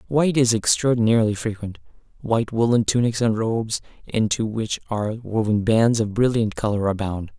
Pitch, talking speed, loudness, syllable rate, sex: 110 Hz, 145 wpm, -21 LUFS, 5.4 syllables/s, male